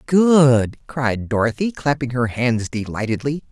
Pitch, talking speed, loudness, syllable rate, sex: 130 Hz, 120 wpm, -19 LUFS, 4.0 syllables/s, male